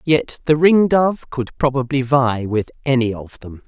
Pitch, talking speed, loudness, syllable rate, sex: 135 Hz, 165 wpm, -17 LUFS, 4.5 syllables/s, female